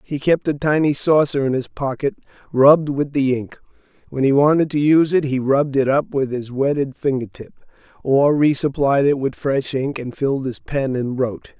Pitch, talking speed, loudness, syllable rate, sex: 140 Hz, 200 wpm, -18 LUFS, 5.1 syllables/s, male